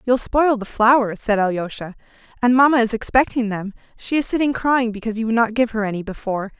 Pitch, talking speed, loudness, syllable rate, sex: 230 Hz, 210 wpm, -19 LUFS, 6.2 syllables/s, female